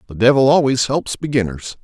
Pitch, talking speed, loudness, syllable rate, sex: 125 Hz, 165 wpm, -16 LUFS, 5.6 syllables/s, male